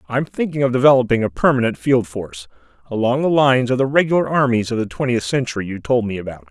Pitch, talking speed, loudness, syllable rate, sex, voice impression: 125 Hz, 210 wpm, -18 LUFS, 6.6 syllables/s, male, masculine, adult-like, slightly thick, cool, slightly sincere, slightly friendly